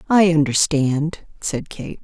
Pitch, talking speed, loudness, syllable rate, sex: 155 Hz, 120 wpm, -19 LUFS, 3.5 syllables/s, female